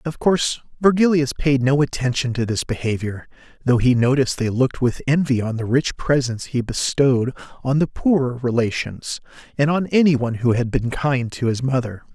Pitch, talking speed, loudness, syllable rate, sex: 130 Hz, 180 wpm, -20 LUFS, 5.3 syllables/s, male